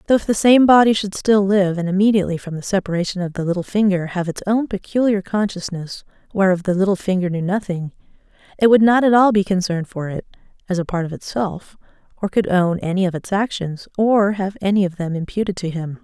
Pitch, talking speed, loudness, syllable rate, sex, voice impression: 190 Hz, 215 wpm, -18 LUFS, 6.0 syllables/s, female, feminine, gender-neutral, slightly young, adult-like, slightly middle-aged, tensed, slightly clear, fluent, slightly cute, cool, very intellectual, sincere, calm, slightly reassuring, slightly elegant, slightly sharp